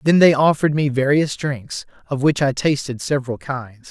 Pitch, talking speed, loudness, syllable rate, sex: 140 Hz, 185 wpm, -19 LUFS, 5.0 syllables/s, male